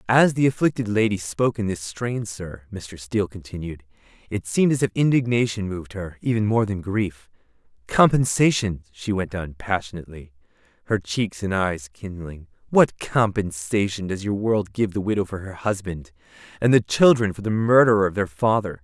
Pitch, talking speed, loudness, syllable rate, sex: 100 Hz, 170 wpm, -22 LUFS, 5.1 syllables/s, male